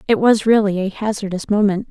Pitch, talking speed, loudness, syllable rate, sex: 205 Hz, 190 wpm, -17 LUFS, 5.7 syllables/s, female